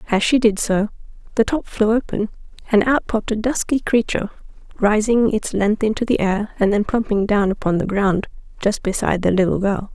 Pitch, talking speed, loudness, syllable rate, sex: 210 Hz, 195 wpm, -19 LUFS, 5.5 syllables/s, female